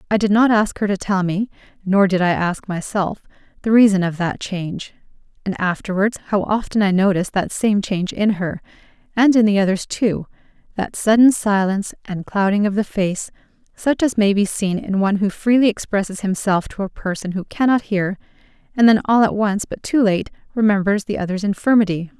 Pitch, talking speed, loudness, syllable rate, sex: 200 Hz, 190 wpm, -18 LUFS, 5.4 syllables/s, female